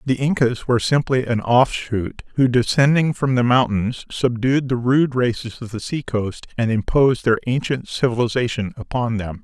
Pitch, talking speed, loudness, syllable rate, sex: 120 Hz, 165 wpm, -19 LUFS, 4.8 syllables/s, male